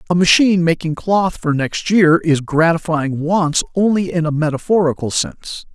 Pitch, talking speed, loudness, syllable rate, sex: 165 Hz, 155 wpm, -16 LUFS, 4.8 syllables/s, male